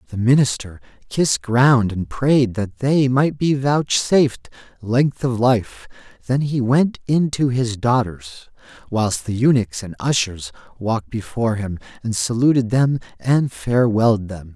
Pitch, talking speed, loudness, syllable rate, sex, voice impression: 120 Hz, 145 wpm, -19 LUFS, 4.3 syllables/s, male, very masculine, very adult-like, middle-aged, very thick, relaxed, slightly powerful, slightly bright, soft, slightly clear, slightly fluent, very cool, very intellectual, slightly refreshing, very sincere, very calm, very mature, very friendly, reassuring, unique, very elegant, sweet, very kind